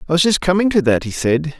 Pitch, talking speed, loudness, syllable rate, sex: 160 Hz, 300 wpm, -16 LUFS, 6.5 syllables/s, male